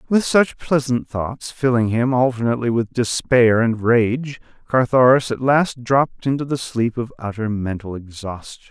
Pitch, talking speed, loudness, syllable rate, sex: 120 Hz, 150 wpm, -19 LUFS, 4.5 syllables/s, male